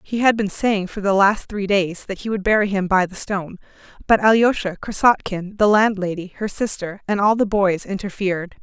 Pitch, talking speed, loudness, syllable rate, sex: 200 Hz, 200 wpm, -19 LUFS, 5.3 syllables/s, female